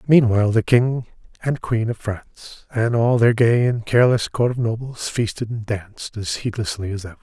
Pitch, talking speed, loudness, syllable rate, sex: 115 Hz, 190 wpm, -20 LUFS, 5.2 syllables/s, male